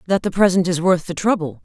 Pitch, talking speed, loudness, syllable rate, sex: 180 Hz, 255 wpm, -18 LUFS, 6.3 syllables/s, female